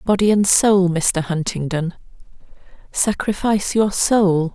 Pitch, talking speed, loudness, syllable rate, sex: 190 Hz, 90 wpm, -18 LUFS, 4.0 syllables/s, female